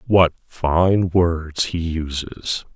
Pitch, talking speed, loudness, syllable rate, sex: 85 Hz, 110 wpm, -20 LUFS, 2.5 syllables/s, male